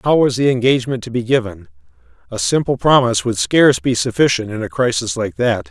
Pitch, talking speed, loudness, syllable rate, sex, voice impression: 125 Hz, 200 wpm, -16 LUFS, 6.0 syllables/s, male, masculine, middle-aged, thick, tensed, powerful, slightly hard, raspy, mature, friendly, wild, lively, strict, slightly intense